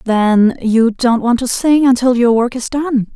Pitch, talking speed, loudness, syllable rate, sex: 240 Hz, 210 wpm, -13 LUFS, 4.1 syllables/s, female